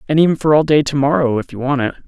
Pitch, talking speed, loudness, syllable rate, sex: 140 Hz, 320 wpm, -15 LUFS, 7.3 syllables/s, male